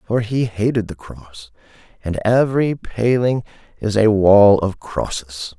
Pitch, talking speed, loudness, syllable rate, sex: 110 Hz, 140 wpm, -17 LUFS, 4.0 syllables/s, male